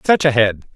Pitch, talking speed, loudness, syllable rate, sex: 135 Hz, 240 wpm, -15 LUFS, 4.9 syllables/s, male